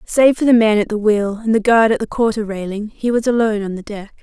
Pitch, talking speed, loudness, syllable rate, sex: 215 Hz, 285 wpm, -16 LUFS, 6.0 syllables/s, female